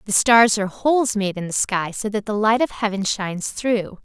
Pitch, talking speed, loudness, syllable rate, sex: 210 Hz, 240 wpm, -20 LUFS, 5.2 syllables/s, female